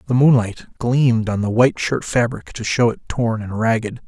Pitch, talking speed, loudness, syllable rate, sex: 115 Hz, 205 wpm, -18 LUFS, 5.2 syllables/s, male